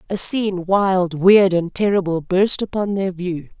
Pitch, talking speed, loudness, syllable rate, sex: 185 Hz, 165 wpm, -18 LUFS, 4.2 syllables/s, female